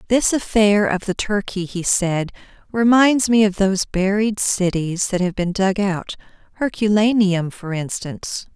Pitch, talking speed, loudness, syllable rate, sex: 200 Hz, 140 wpm, -19 LUFS, 4.3 syllables/s, female